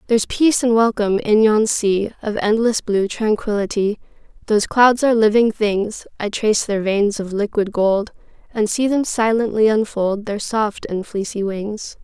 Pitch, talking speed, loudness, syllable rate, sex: 215 Hz, 165 wpm, -18 LUFS, 4.7 syllables/s, female